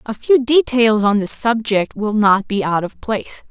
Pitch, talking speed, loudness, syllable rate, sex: 220 Hz, 205 wpm, -16 LUFS, 4.4 syllables/s, female